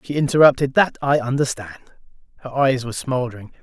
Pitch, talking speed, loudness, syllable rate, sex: 130 Hz, 150 wpm, -19 LUFS, 6.4 syllables/s, male